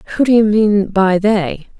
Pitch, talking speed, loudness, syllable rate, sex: 205 Hz, 200 wpm, -13 LUFS, 4.5 syllables/s, female